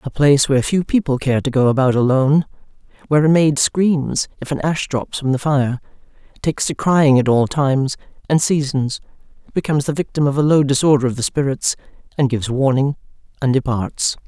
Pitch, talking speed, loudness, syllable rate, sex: 140 Hz, 185 wpm, -17 LUFS, 5.7 syllables/s, female